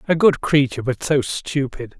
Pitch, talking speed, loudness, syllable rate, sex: 140 Hz, 180 wpm, -19 LUFS, 5.0 syllables/s, male